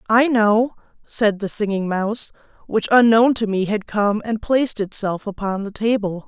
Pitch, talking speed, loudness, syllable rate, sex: 215 Hz, 170 wpm, -19 LUFS, 4.7 syllables/s, female